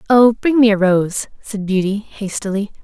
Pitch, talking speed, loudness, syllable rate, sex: 210 Hz, 170 wpm, -16 LUFS, 4.6 syllables/s, female